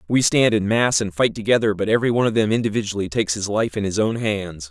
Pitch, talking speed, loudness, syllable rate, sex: 105 Hz, 255 wpm, -20 LUFS, 6.7 syllables/s, male